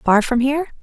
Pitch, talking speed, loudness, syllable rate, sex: 260 Hz, 220 wpm, -18 LUFS, 6.2 syllables/s, female